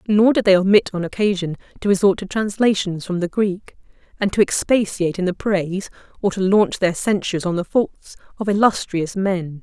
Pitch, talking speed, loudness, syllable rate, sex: 190 Hz, 185 wpm, -19 LUFS, 5.3 syllables/s, female